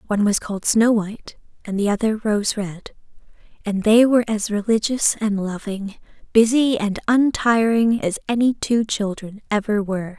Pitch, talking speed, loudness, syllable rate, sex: 215 Hz, 155 wpm, -19 LUFS, 4.8 syllables/s, female